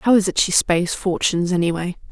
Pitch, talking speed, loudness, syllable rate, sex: 180 Hz, 225 wpm, -19 LUFS, 5.8 syllables/s, female